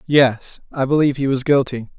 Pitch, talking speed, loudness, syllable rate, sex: 135 Hz, 180 wpm, -18 LUFS, 5.4 syllables/s, male